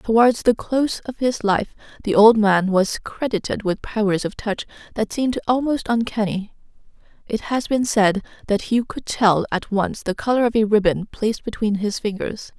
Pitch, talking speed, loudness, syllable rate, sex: 215 Hz, 180 wpm, -20 LUFS, 4.9 syllables/s, female